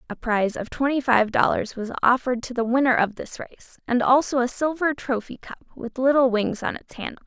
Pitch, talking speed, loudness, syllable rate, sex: 250 Hz, 215 wpm, -22 LUFS, 5.6 syllables/s, female